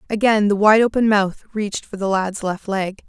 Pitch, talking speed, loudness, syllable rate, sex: 205 Hz, 215 wpm, -18 LUFS, 5.1 syllables/s, female